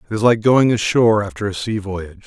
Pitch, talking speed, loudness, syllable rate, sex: 105 Hz, 240 wpm, -17 LUFS, 6.3 syllables/s, male